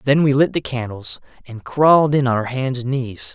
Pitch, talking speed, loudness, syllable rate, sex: 125 Hz, 235 wpm, -18 LUFS, 5.1 syllables/s, male